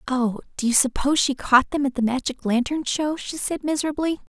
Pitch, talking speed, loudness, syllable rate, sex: 270 Hz, 205 wpm, -22 LUFS, 5.7 syllables/s, female